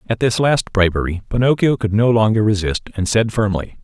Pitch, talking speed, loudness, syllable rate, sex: 110 Hz, 190 wpm, -17 LUFS, 5.5 syllables/s, male